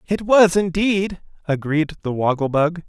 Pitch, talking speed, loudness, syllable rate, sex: 170 Hz, 145 wpm, -19 LUFS, 4.2 syllables/s, male